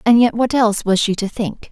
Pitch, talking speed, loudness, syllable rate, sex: 220 Hz, 280 wpm, -17 LUFS, 5.6 syllables/s, female